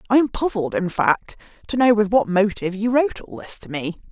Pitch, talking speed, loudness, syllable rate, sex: 215 Hz, 235 wpm, -20 LUFS, 5.9 syllables/s, female